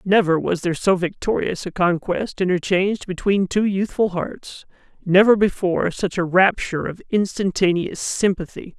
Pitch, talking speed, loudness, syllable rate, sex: 185 Hz, 135 wpm, -20 LUFS, 4.9 syllables/s, male